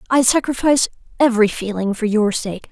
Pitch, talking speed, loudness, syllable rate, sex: 230 Hz, 155 wpm, -18 LUFS, 5.9 syllables/s, female